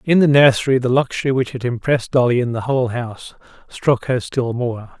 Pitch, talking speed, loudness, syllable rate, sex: 125 Hz, 205 wpm, -18 LUFS, 5.7 syllables/s, male